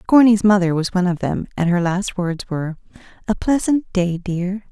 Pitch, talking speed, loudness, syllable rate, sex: 190 Hz, 180 wpm, -19 LUFS, 5.2 syllables/s, female